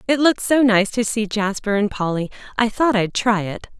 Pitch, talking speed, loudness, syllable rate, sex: 215 Hz, 220 wpm, -19 LUFS, 5.2 syllables/s, female